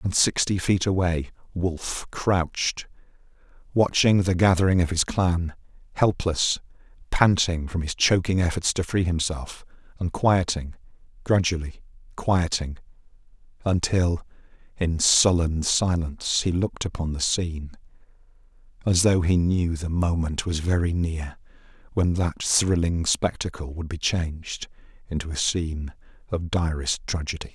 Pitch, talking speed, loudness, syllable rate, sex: 85 Hz, 120 wpm, -24 LUFS, 4.4 syllables/s, male